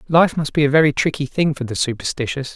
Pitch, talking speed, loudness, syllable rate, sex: 145 Hz, 235 wpm, -18 LUFS, 6.3 syllables/s, male